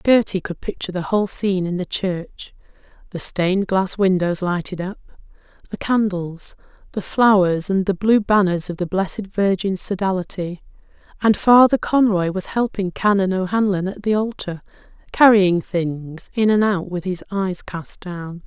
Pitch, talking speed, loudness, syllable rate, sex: 190 Hz, 155 wpm, -19 LUFS, 4.7 syllables/s, female